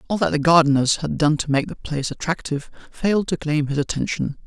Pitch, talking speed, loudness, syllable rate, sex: 150 Hz, 215 wpm, -21 LUFS, 6.2 syllables/s, male